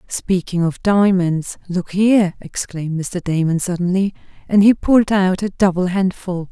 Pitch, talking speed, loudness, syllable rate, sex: 185 Hz, 145 wpm, -17 LUFS, 4.6 syllables/s, female